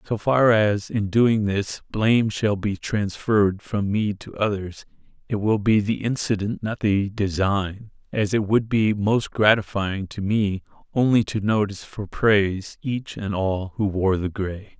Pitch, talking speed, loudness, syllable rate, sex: 105 Hz, 170 wpm, -22 LUFS, 4.1 syllables/s, male